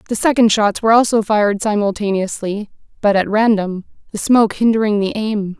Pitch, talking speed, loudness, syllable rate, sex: 210 Hz, 160 wpm, -16 LUFS, 5.6 syllables/s, female